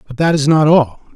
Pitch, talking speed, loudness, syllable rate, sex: 150 Hz, 260 wpm, -13 LUFS, 5.8 syllables/s, male